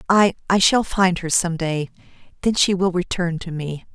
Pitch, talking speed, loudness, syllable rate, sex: 180 Hz, 180 wpm, -20 LUFS, 4.7 syllables/s, female